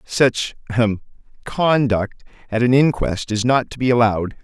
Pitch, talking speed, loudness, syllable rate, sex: 120 Hz, 135 wpm, -18 LUFS, 4.6 syllables/s, male